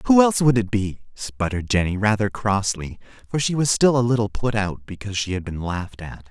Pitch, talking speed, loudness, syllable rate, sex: 105 Hz, 220 wpm, -21 LUFS, 5.8 syllables/s, male